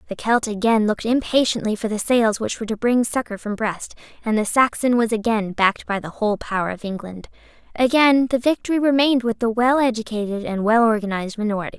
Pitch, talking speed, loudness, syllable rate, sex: 225 Hz, 200 wpm, -20 LUFS, 6.1 syllables/s, female